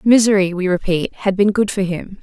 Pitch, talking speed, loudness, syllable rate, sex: 195 Hz, 215 wpm, -17 LUFS, 5.2 syllables/s, female